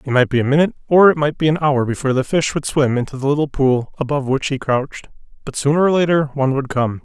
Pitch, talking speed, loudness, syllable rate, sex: 140 Hz, 265 wpm, -17 LUFS, 6.8 syllables/s, male